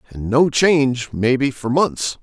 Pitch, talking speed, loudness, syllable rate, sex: 130 Hz, 160 wpm, -17 LUFS, 4.0 syllables/s, male